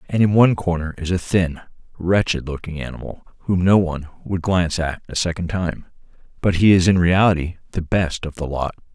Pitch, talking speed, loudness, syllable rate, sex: 90 Hz, 195 wpm, -20 LUFS, 5.5 syllables/s, male